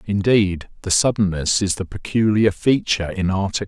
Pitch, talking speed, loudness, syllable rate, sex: 100 Hz, 145 wpm, -19 LUFS, 4.9 syllables/s, male